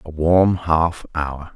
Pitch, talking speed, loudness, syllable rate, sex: 80 Hz, 155 wpm, -19 LUFS, 2.9 syllables/s, male